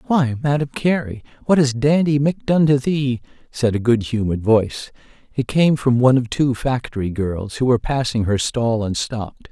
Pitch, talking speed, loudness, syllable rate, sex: 125 Hz, 190 wpm, -19 LUFS, 5.1 syllables/s, male